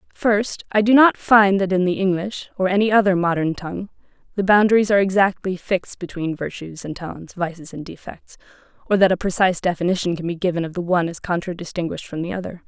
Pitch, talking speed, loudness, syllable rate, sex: 185 Hz, 200 wpm, -20 LUFS, 6.3 syllables/s, female